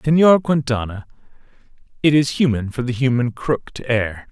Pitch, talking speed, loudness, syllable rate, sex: 130 Hz, 155 wpm, -18 LUFS, 5.0 syllables/s, male